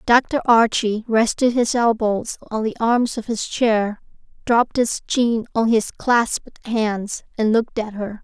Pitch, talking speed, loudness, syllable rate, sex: 225 Hz, 160 wpm, -20 LUFS, 3.9 syllables/s, female